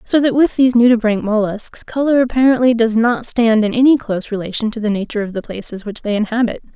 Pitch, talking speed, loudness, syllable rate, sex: 230 Hz, 215 wpm, -16 LUFS, 6.3 syllables/s, female